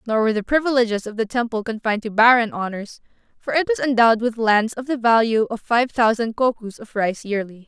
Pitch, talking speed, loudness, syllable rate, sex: 230 Hz, 210 wpm, -19 LUFS, 5.9 syllables/s, female